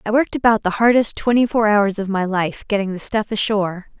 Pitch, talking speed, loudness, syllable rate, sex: 210 Hz, 225 wpm, -18 LUFS, 5.8 syllables/s, female